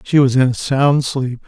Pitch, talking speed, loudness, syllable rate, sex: 130 Hz, 245 wpm, -15 LUFS, 4.5 syllables/s, male